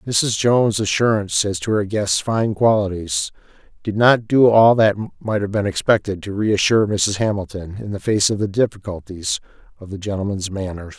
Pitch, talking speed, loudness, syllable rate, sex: 105 Hz, 175 wpm, -19 LUFS, 5.1 syllables/s, male